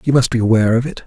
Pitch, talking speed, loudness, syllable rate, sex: 120 Hz, 340 wpm, -15 LUFS, 8.4 syllables/s, male